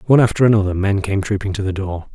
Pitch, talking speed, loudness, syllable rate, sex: 100 Hz, 250 wpm, -18 LUFS, 7.1 syllables/s, male